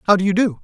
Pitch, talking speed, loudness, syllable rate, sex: 195 Hz, 380 wpm, -17 LUFS, 8.5 syllables/s, male